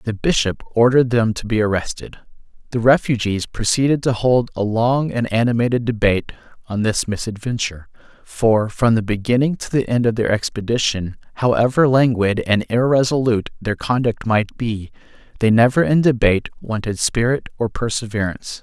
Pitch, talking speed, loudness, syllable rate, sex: 115 Hz, 150 wpm, -18 LUFS, 5.3 syllables/s, male